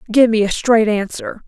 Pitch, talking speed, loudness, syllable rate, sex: 220 Hz, 205 wpm, -15 LUFS, 4.9 syllables/s, female